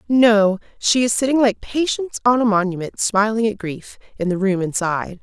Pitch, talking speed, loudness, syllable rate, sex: 215 Hz, 185 wpm, -18 LUFS, 5.2 syllables/s, female